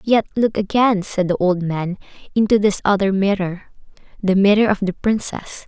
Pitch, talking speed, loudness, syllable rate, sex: 200 Hz, 170 wpm, -18 LUFS, 4.8 syllables/s, female